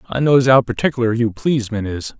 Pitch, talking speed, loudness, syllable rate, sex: 120 Hz, 190 wpm, -17 LUFS, 5.5 syllables/s, male